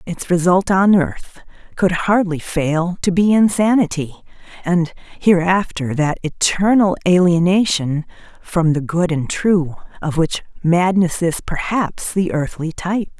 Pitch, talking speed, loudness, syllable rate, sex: 175 Hz, 125 wpm, -17 LUFS, 4.1 syllables/s, female